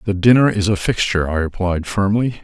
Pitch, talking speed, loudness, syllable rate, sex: 100 Hz, 195 wpm, -17 LUFS, 5.9 syllables/s, male